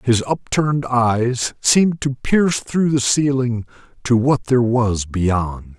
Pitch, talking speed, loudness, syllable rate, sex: 125 Hz, 145 wpm, -18 LUFS, 3.9 syllables/s, male